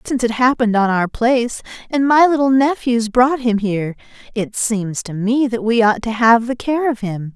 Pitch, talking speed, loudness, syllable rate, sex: 235 Hz, 210 wpm, -16 LUFS, 5.0 syllables/s, female